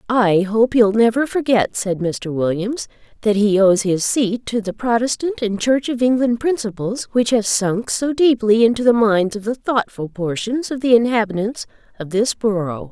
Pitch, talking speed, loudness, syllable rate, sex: 220 Hz, 180 wpm, -18 LUFS, 4.6 syllables/s, female